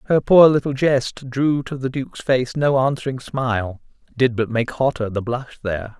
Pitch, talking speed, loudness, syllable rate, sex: 130 Hz, 190 wpm, -20 LUFS, 4.8 syllables/s, male